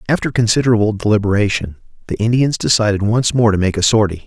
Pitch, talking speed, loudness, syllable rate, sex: 110 Hz, 170 wpm, -15 LUFS, 6.6 syllables/s, male